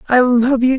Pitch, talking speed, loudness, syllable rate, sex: 250 Hz, 230 wpm, -14 LUFS, 4.6 syllables/s, female